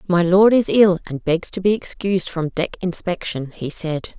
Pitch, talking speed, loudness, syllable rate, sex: 180 Hz, 200 wpm, -19 LUFS, 4.6 syllables/s, female